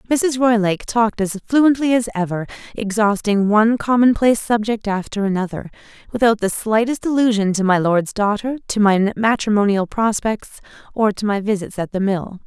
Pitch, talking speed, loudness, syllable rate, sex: 215 Hz, 160 wpm, -18 LUFS, 5.3 syllables/s, female